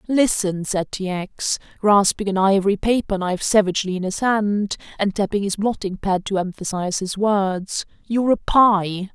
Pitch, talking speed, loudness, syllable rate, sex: 200 Hz, 160 wpm, -20 LUFS, 4.8 syllables/s, female